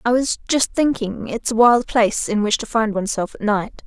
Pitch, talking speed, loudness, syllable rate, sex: 225 Hz, 250 wpm, -19 LUFS, 5.2 syllables/s, female